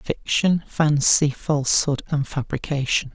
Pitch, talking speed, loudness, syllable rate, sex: 145 Hz, 95 wpm, -20 LUFS, 4.0 syllables/s, male